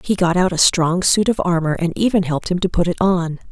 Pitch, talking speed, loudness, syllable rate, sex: 175 Hz, 275 wpm, -17 LUFS, 5.8 syllables/s, female